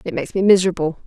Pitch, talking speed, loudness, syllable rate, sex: 185 Hz, 225 wpm, -17 LUFS, 8.7 syllables/s, female